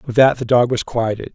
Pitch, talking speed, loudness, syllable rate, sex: 120 Hz, 270 wpm, -17 LUFS, 5.8 syllables/s, male